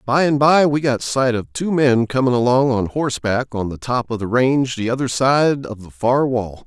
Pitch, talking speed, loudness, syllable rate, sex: 125 Hz, 235 wpm, -18 LUFS, 4.9 syllables/s, male